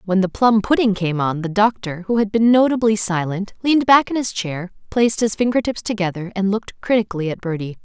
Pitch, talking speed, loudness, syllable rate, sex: 205 Hz, 215 wpm, -18 LUFS, 5.8 syllables/s, female